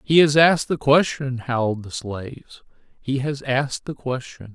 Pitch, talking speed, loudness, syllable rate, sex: 130 Hz, 160 wpm, -21 LUFS, 4.9 syllables/s, male